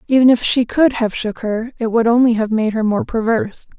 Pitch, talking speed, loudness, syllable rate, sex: 230 Hz, 240 wpm, -16 LUFS, 5.5 syllables/s, female